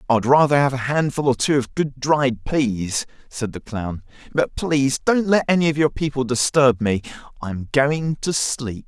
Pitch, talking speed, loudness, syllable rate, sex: 135 Hz, 195 wpm, -20 LUFS, 4.6 syllables/s, male